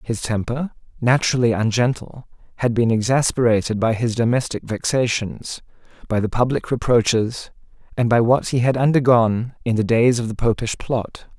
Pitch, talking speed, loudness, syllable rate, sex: 120 Hz, 150 wpm, -19 LUFS, 5.1 syllables/s, male